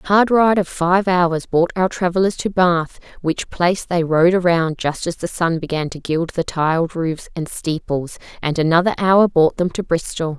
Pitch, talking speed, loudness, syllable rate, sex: 175 Hz, 200 wpm, -18 LUFS, 4.6 syllables/s, female